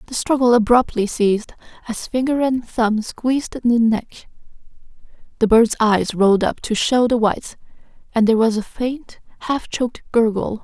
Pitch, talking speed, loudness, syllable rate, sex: 230 Hz, 160 wpm, -18 LUFS, 4.8 syllables/s, female